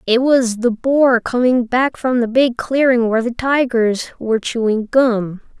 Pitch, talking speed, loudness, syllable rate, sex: 240 Hz, 170 wpm, -16 LUFS, 4.2 syllables/s, female